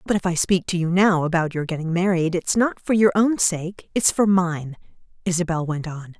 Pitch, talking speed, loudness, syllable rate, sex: 175 Hz, 225 wpm, -21 LUFS, 5.1 syllables/s, female